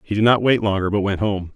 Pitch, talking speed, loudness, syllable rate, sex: 105 Hz, 310 wpm, -19 LUFS, 6.2 syllables/s, male